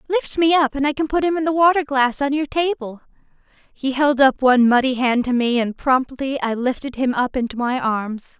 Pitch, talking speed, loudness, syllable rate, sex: 270 Hz, 220 wpm, -19 LUFS, 5.2 syllables/s, female